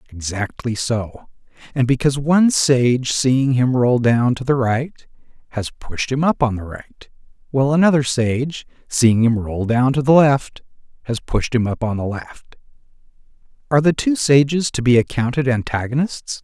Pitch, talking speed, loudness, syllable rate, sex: 130 Hz, 165 wpm, -18 LUFS, 4.6 syllables/s, male